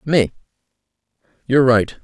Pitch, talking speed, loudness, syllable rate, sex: 125 Hz, 90 wpm, -17 LUFS, 5.2 syllables/s, male